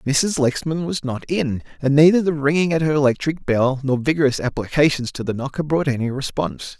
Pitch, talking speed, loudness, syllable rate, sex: 145 Hz, 195 wpm, -20 LUFS, 5.5 syllables/s, male